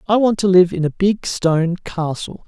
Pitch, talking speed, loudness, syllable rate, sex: 180 Hz, 220 wpm, -17 LUFS, 4.9 syllables/s, male